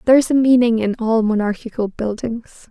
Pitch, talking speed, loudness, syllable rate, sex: 230 Hz, 175 wpm, -17 LUFS, 5.5 syllables/s, female